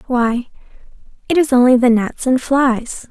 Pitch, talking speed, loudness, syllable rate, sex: 250 Hz, 155 wpm, -15 LUFS, 4.2 syllables/s, female